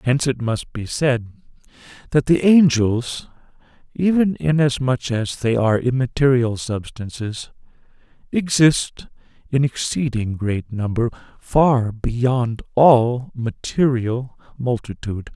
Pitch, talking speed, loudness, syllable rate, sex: 125 Hz, 100 wpm, -19 LUFS, 3.8 syllables/s, male